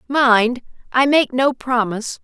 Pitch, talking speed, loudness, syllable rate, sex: 250 Hz, 135 wpm, -17 LUFS, 4.0 syllables/s, female